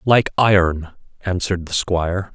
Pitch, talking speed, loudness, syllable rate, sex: 90 Hz, 130 wpm, -18 LUFS, 4.6 syllables/s, male